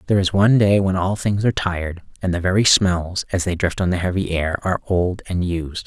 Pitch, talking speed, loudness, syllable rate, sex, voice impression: 90 Hz, 245 wpm, -19 LUFS, 5.8 syllables/s, male, masculine, very adult-like, slightly thick, cool, calm, elegant, slightly kind